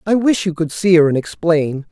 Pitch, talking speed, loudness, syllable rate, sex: 170 Hz, 250 wpm, -16 LUFS, 5.1 syllables/s, male